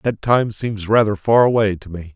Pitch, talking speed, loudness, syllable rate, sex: 105 Hz, 225 wpm, -17 LUFS, 4.7 syllables/s, male